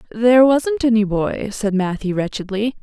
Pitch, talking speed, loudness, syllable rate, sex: 220 Hz, 150 wpm, -17 LUFS, 4.8 syllables/s, female